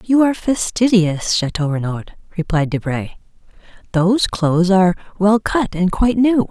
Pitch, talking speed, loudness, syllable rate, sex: 195 Hz, 140 wpm, -17 LUFS, 5.1 syllables/s, female